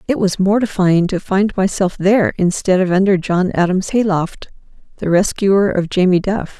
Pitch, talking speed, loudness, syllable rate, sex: 190 Hz, 165 wpm, -15 LUFS, 4.8 syllables/s, female